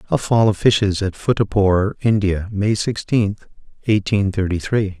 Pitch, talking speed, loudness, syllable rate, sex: 100 Hz, 145 wpm, -18 LUFS, 4.4 syllables/s, male